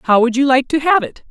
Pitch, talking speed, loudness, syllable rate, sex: 260 Hz, 325 wpm, -14 LUFS, 5.7 syllables/s, female